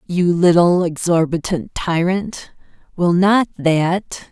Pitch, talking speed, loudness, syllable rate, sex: 175 Hz, 95 wpm, -17 LUFS, 3.6 syllables/s, female